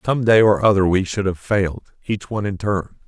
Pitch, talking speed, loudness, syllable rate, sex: 100 Hz, 235 wpm, -19 LUFS, 5.6 syllables/s, male